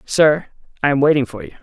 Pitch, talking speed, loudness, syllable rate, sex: 145 Hz, 220 wpm, -17 LUFS, 6.4 syllables/s, male